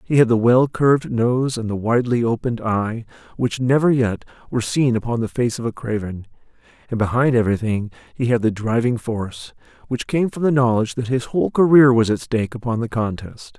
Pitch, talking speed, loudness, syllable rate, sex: 120 Hz, 200 wpm, -19 LUFS, 5.7 syllables/s, male